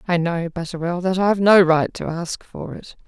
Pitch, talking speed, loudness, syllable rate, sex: 175 Hz, 215 wpm, -19 LUFS, 4.9 syllables/s, female